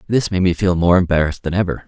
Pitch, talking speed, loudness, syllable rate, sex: 90 Hz, 255 wpm, -17 LUFS, 7.1 syllables/s, male